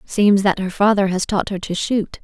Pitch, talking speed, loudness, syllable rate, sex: 195 Hz, 240 wpm, -18 LUFS, 4.7 syllables/s, female